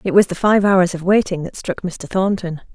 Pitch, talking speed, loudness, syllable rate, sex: 185 Hz, 240 wpm, -17 LUFS, 5.1 syllables/s, female